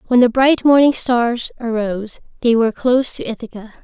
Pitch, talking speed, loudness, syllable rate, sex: 240 Hz, 170 wpm, -16 LUFS, 5.5 syllables/s, female